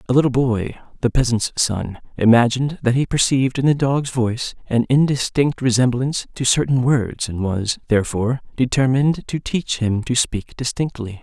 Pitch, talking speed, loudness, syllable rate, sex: 125 Hz, 160 wpm, -19 LUFS, 5.2 syllables/s, male